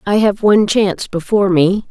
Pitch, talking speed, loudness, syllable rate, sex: 200 Hz, 190 wpm, -14 LUFS, 5.8 syllables/s, female